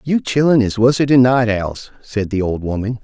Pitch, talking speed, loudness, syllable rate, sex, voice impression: 115 Hz, 220 wpm, -16 LUFS, 5.0 syllables/s, male, very masculine, very adult-like, very middle-aged, very thick, very tensed, powerful, slightly dark, slightly soft, slightly muffled, very fluent, slightly raspy, cool, very intellectual, very sincere, very calm, very mature, friendly, very reassuring, unique, wild, slightly strict